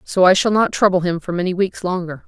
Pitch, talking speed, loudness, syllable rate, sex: 185 Hz, 265 wpm, -17 LUFS, 6.0 syllables/s, female